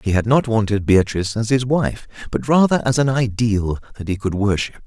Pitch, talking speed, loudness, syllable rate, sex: 110 Hz, 210 wpm, -19 LUFS, 5.3 syllables/s, male